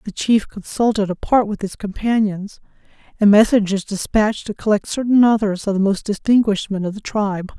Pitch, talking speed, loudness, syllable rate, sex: 205 Hz, 175 wpm, -18 LUFS, 5.6 syllables/s, female